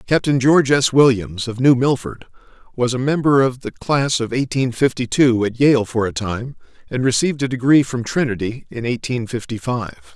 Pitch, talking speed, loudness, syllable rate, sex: 125 Hz, 190 wpm, -18 LUFS, 5.1 syllables/s, male